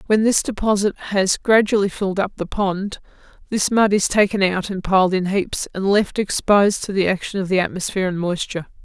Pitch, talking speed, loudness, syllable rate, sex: 195 Hz, 195 wpm, -19 LUFS, 5.5 syllables/s, female